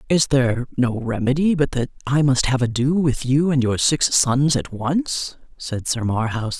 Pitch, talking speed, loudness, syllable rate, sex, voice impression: 135 Hz, 190 wpm, -20 LUFS, 4.4 syllables/s, female, feminine, very adult-like, slightly intellectual, calm, slightly sweet